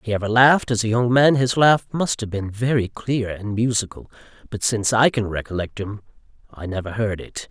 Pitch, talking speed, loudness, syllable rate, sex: 115 Hz, 215 wpm, -20 LUFS, 5.5 syllables/s, male